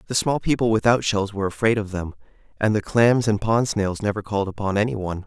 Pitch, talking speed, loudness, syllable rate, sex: 105 Hz, 230 wpm, -22 LUFS, 6.2 syllables/s, male